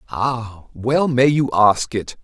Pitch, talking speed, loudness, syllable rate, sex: 120 Hz, 160 wpm, -18 LUFS, 3.2 syllables/s, male